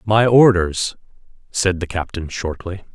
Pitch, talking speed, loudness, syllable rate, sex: 95 Hz, 120 wpm, -18 LUFS, 4.0 syllables/s, male